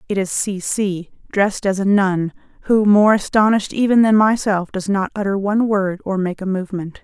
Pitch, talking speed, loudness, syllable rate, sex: 200 Hz, 195 wpm, -17 LUFS, 5.3 syllables/s, female